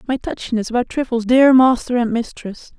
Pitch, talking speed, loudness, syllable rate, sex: 245 Hz, 170 wpm, -16 LUFS, 5.4 syllables/s, female